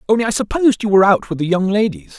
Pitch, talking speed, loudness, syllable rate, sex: 185 Hz, 275 wpm, -16 LUFS, 7.5 syllables/s, male